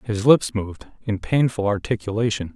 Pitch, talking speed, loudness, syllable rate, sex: 110 Hz, 115 wpm, -21 LUFS, 5.3 syllables/s, male